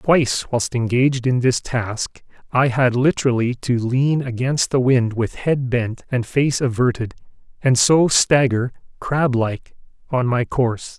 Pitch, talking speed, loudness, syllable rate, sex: 125 Hz, 155 wpm, -19 LUFS, 4.1 syllables/s, male